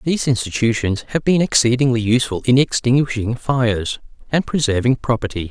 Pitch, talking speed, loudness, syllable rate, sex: 125 Hz, 130 wpm, -18 LUFS, 5.8 syllables/s, male